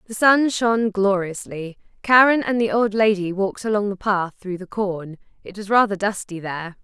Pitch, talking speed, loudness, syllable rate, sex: 200 Hz, 185 wpm, -20 LUFS, 5.1 syllables/s, female